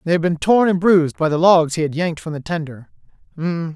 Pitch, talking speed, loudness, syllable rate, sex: 165 Hz, 240 wpm, -17 LUFS, 6.4 syllables/s, male